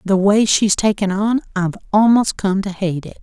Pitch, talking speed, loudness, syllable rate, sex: 200 Hz, 205 wpm, -16 LUFS, 5.0 syllables/s, female